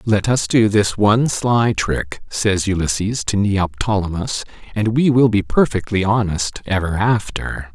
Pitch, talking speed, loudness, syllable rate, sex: 105 Hz, 145 wpm, -18 LUFS, 4.2 syllables/s, male